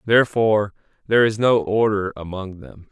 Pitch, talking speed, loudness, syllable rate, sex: 105 Hz, 145 wpm, -19 LUFS, 5.3 syllables/s, male